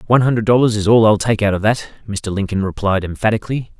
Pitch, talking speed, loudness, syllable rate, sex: 105 Hz, 220 wpm, -16 LUFS, 6.7 syllables/s, male